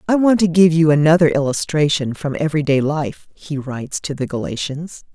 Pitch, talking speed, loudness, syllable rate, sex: 155 Hz, 175 wpm, -17 LUFS, 5.4 syllables/s, female